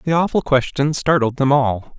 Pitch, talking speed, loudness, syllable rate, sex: 140 Hz, 180 wpm, -17 LUFS, 4.6 syllables/s, male